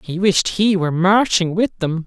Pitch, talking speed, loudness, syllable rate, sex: 185 Hz, 205 wpm, -17 LUFS, 4.8 syllables/s, male